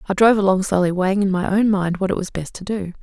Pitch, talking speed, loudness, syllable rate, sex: 190 Hz, 300 wpm, -19 LUFS, 6.8 syllables/s, female